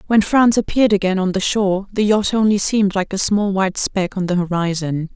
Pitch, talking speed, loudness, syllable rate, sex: 195 Hz, 220 wpm, -17 LUFS, 5.7 syllables/s, female